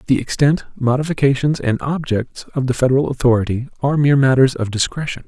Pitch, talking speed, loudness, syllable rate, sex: 130 Hz, 160 wpm, -17 LUFS, 6.3 syllables/s, male